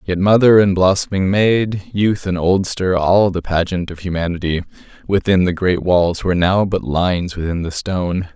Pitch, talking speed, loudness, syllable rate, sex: 90 Hz, 170 wpm, -16 LUFS, 4.8 syllables/s, male